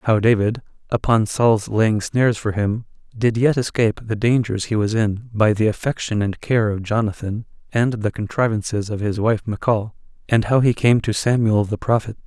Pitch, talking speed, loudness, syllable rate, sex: 110 Hz, 185 wpm, -20 LUFS, 5.0 syllables/s, male